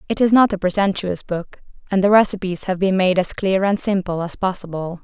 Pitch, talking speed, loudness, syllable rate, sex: 190 Hz, 215 wpm, -19 LUFS, 5.5 syllables/s, female